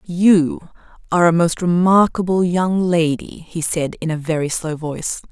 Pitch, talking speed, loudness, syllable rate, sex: 170 Hz, 160 wpm, -17 LUFS, 4.5 syllables/s, female